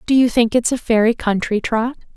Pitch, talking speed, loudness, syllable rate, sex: 230 Hz, 220 wpm, -17 LUFS, 5.3 syllables/s, female